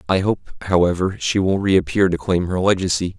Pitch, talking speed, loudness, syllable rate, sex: 95 Hz, 190 wpm, -19 LUFS, 5.6 syllables/s, male